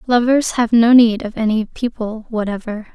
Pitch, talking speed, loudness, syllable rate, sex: 230 Hz, 165 wpm, -16 LUFS, 4.7 syllables/s, female